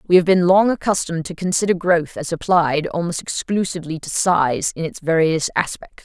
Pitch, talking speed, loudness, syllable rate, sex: 170 Hz, 180 wpm, -19 LUFS, 5.3 syllables/s, female